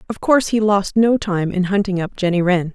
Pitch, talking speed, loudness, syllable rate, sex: 195 Hz, 240 wpm, -17 LUFS, 5.5 syllables/s, female